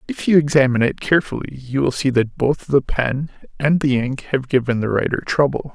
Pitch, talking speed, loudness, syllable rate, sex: 140 Hz, 210 wpm, -19 LUFS, 5.5 syllables/s, male